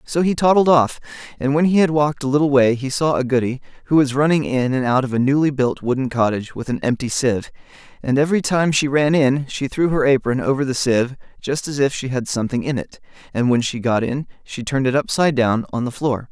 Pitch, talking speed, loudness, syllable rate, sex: 135 Hz, 245 wpm, -19 LUFS, 6.1 syllables/s, male